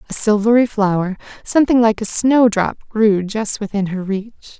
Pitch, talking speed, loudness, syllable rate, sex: 215 Hz, 170 wpm, -16 LUFS, 4.9 syllables/s, female